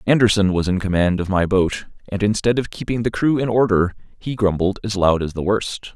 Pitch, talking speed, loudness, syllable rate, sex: 100 Hz, 220 wpm, -19 LUFS, 5.5 syllables/s, male